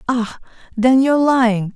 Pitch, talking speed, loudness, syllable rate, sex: 245 Hz, 170 wpm, -15 LUFS, 5.9 syllables/s, female